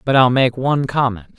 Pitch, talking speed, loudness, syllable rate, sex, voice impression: 125 Hz, 215 wpm, -16 LUFS, 5.4 syllables/s, male, masculine, adult-like, tensed, powerful, bright, clear, slightly halting, friendly, unique, wild, lively, intense